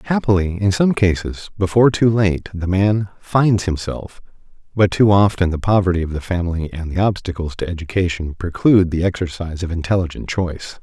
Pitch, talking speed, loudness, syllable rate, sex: 90 Hz, 165 wpm, -18 LUFS, 5.6 syllables/s, male